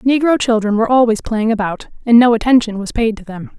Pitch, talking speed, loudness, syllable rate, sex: 230 Hz, 220 wpm, -14 LUFS, 5.9 syllables/s, female